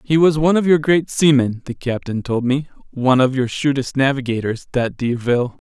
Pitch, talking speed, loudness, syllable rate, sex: 135 Hz, 190 wpm, -18 LUFS, 5.4 syllables/s, male